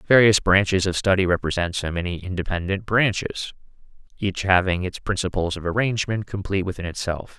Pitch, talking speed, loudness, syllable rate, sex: 95 Hz, 145 wpm, -22 LUFS, 5.8 syllables/s, male